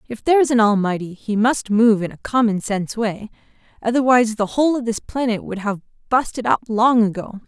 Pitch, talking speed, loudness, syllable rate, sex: 220 Hz, 195 wpm, -19 LUFS, 5.6 syllables/s, female